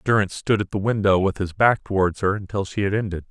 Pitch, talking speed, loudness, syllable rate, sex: 100 Hz, 255 wpm, -22 LUFS, 6.3 syllables/s, male